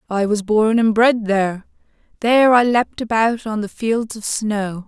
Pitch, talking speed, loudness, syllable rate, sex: 220 Hz, 170 wpm, -17 LUFS, 4.4 syllables/s, female